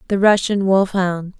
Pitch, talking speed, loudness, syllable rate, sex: 190 Hz, 130 wpm, -17 LUFS, 4.3 syllables/s, female